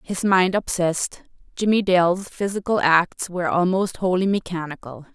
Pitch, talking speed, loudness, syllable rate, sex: 180 Hz, 130 wpm, -21 LUFS, 4.9 syllables/s, female